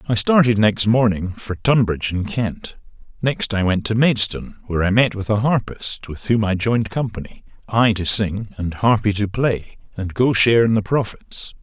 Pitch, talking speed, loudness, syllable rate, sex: 105 Hz, 190 wpm, -19 LUFS, 4.9 syllables/s, male